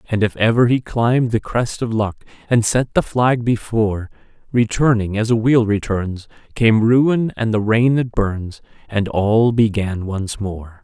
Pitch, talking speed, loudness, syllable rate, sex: 110 Hz, 170 wpm, -18 LUFS, 4.1 syllables/s, male